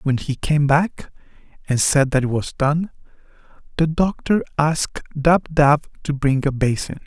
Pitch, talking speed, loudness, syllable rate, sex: 145 Hz, 160 wpm, -19 LUFS, 4.4 syllables/s, male